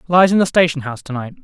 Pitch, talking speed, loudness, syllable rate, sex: 155 Hz, 290 wpm, -16 LUFS, 7.6 syllables/s, male